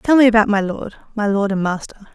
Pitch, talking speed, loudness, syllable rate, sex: 210 Hz, 225 wpm, -17 LUFS, 6.5 syllables/s, female